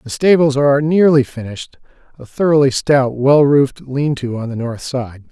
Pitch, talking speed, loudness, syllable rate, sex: 135 Hz, 170 wpm, -15 LUFS, 5.0 syllables/s, male